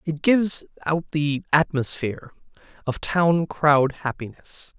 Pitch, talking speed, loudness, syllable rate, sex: 150 Hz, 115 wpm, -22 LUFS, 3.9 syllables/s, male